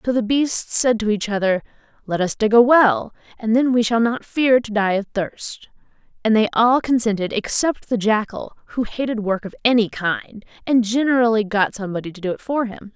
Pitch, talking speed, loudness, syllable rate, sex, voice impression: 220 Hz, 205 wpm, -19 LUFS, 5.1 syllables/s, female, feminine, adult-like, tensed, soft, slightly fluent, slightly raspy, intellectual, calm, friendly, reassuring, elegant, slightly lively, kind